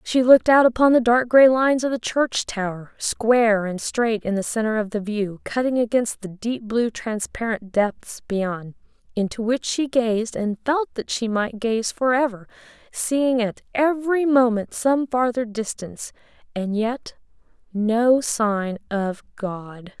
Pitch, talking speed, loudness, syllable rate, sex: 230 Hz, 160 wpm, -21 LUFS, 4.1 syllables/s, female